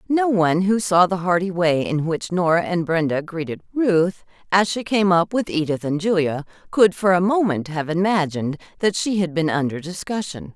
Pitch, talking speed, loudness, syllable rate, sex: 175 Hz, 195 wpm, -20 LUFS, 5.0 syllables/s, female